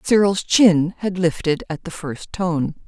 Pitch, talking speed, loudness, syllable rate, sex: 175 Hz, 165 wpm, -19 LUFS, 3.9 syllables/s, female